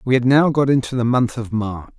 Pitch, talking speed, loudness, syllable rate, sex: 120 Hz, 270 wpm, -18 LUFS, 5.4 syllables/s, male